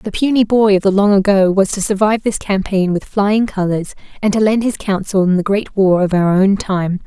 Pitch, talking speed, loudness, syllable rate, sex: 200 Hz, 240 wpm, -15 LUFS, 5.2 syllables/s, female